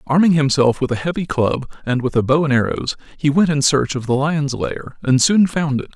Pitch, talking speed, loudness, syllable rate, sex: 140 Hz, 240 wpm, -18 LUFS, 5.3 syllables/s, male